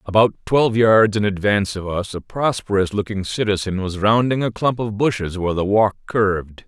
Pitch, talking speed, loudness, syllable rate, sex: 105 Hz, 190 wpm, -19 LUFS, 5.3 syllables/s, male